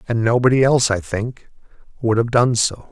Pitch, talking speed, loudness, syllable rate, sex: 120 Hz, 185 wpm, -17 LUFS, 5.3 syllables/s, male